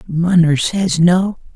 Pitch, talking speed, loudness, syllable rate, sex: 175 Hz, 115 wpm, -14 LUFS, 3.1 syllables/s, male